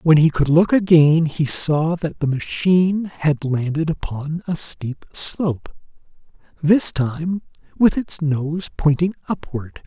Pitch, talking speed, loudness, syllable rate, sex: 160 Hz, 140 wpm, -19 LUFS, 3.7 syllables/s, male